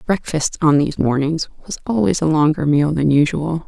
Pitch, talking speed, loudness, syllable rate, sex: 155 Hz, 180 wpm, -17 LUFS, 5.1 syllables/s, female